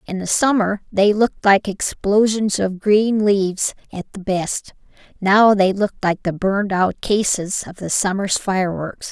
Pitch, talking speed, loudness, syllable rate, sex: 195 Hz, 165 wpm, -18 LUFS, 4.3 syllables/s, female